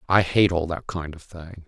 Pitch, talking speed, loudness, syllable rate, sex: 85 Hz, 250 wpm, -23 LUFS, 4.7 syllables/s, male